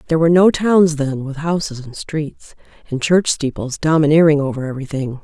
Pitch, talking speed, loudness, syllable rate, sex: 150 Hz, 170 wpm, -16 LUFS, 5.5 syllables/s, female